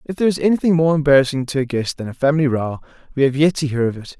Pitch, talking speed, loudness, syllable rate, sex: 140 Hz, 285 wpm, -18 LUFS, 7.4 syllables/s, male